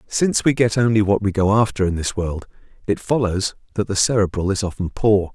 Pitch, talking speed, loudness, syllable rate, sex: 100 Hz, 215 wpm, -19 LUFS, 5.7 syllables/s, male